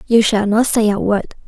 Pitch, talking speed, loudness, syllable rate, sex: 215 Hz, 245 wpm, -15 LUFS, 4.9 syllables/s, female